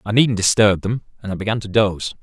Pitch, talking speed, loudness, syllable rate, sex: 105 Hz, 245 wpm, -18 LUFS, 6.3 syllables/s, male